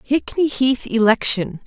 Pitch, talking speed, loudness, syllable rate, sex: 240 Hz, 110 wpm, -18 LUFS, 3.9 syllables/s, female